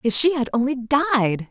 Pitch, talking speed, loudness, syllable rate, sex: 260 Hz, 200 wpm, -20 LUFS, 4.4 syllables/s, female